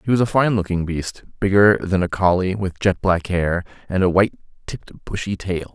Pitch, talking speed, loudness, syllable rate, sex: 95 Hz, 210 wpm, -19 LUFS, 5.3 syllables/s, male